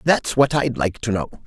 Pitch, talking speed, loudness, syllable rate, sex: 120 Hz, 245 wpm, -20 LUFS, 4.9 syllables/s, male